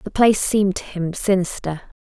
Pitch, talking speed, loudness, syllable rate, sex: 190 Hz, 175 wpm, -20 LUFS, 5.3 syllables/s, female